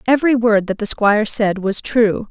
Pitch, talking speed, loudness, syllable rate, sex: 220 Hz, 210 wpm, -16 LUFS, 5.1 syllables/s, female